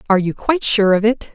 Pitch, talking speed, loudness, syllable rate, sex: 215 Hz, 265 wpm, -16 LUFS, 6.8 syllables/s, female